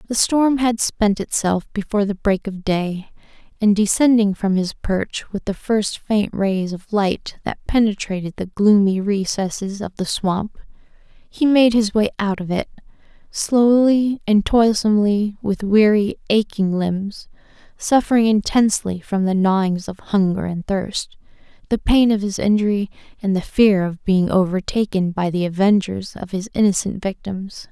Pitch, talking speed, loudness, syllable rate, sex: 205 Hz, 155 wpm, -19 LUFS, 4.4 syllables/s, female